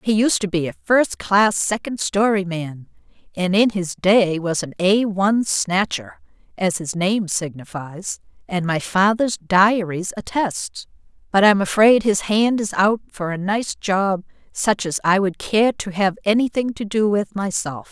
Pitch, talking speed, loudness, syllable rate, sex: 195 Hz, 165 wpm, -19 LUFS, 4.1 syllables/s, female